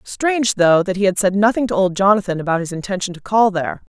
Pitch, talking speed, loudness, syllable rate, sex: 195 Hz, 240 wpm, -17 LUFS, 6.4 syllables/s, female